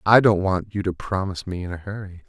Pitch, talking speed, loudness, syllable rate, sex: 95 Hz, 265 wpm, -23 LUFS, 6.2 syllables/s, male